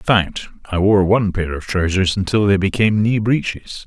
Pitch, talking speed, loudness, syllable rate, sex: 100 Hz, 185 wpm, -17 LUFS, 5.4 syllables/s, male